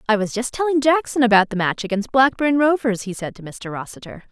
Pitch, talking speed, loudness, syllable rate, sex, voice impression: 235 Hz, 225 wpm, -19 LUFS, 5.9 syllables/s, female, very feminine, young, thin, slightly tensed, slightly powerful, bright, hard, very clear, very fluent, cute, very intellectual, very refreshing, very sincere, calm, friendly, reassuring, unique, very elegant, slightly wild, sweet, very lively, kind, slightly intense, slightly sharp